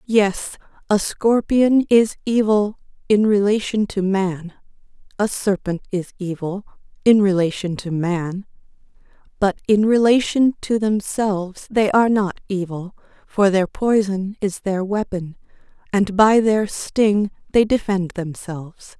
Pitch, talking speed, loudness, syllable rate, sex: 200 Hz, 125 wpm, -19 LUFS, 4.0 syllables/s, female